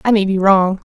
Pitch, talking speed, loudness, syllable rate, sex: 195 Hz, 265 wpm, -14 LUFS, 5.3 syllables/s, female